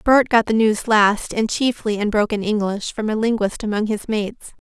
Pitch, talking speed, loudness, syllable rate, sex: 215 Hz, 205 wpm, -19 LUFS, 4.9 syllables/s, female